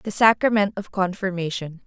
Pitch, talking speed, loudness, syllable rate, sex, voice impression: 190 Hz, 130 wpm, -22 LUFS, 5.1 syllables/s, female, feminine, slightly gender-neutral, slightly young, tensed, powerful, slightly bright, clear, fluent, intellectual, slightly friendly, unique, lively